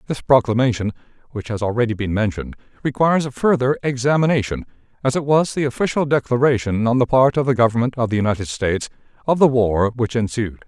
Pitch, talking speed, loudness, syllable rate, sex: 120 Hz, 180 wpm, -19 LUFS, 6.4 syllables/s, male